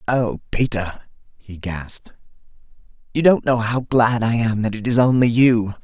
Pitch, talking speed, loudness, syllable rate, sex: 115 Hz, 165 wpm, -19 LUFS, 4.5 syllables/s, male